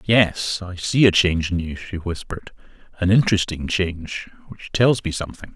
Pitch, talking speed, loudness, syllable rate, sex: 90 Hz, 160 wpm, -21 LUFS, 5.7 syllables/s, male